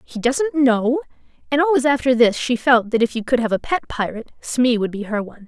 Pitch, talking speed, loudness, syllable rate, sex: 250 Hz, 240 wpm, -19 LUFS, 5.6 syllables/s, female